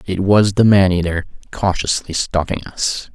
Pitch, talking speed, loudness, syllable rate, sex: 95 Hz, 150 wpm, -16 LUFS, 4.4 syllables/s, male